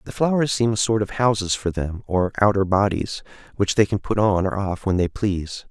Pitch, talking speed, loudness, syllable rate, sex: 100 Hz, 230 wpm, -21 LUFS, 5.3 syllables/s, male